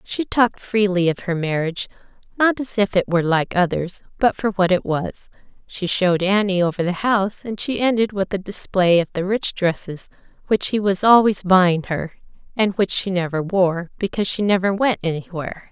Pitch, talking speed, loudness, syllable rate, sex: 190 Hz, 190 wpm, -20 LUFS, 5.2 syllables/s, female